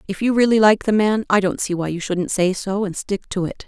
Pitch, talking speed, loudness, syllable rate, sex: 200 Hz, 295 wpm, -19 LUFS, 5.5 syllables/s, female